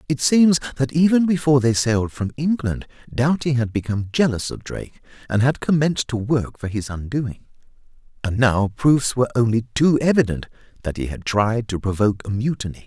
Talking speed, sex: 190 wpm, male